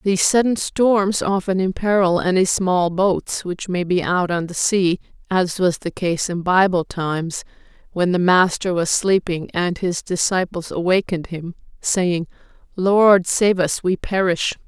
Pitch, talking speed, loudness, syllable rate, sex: 180 Hz, 155 wpm, -19 LUFS, 4.2 syllables/s, female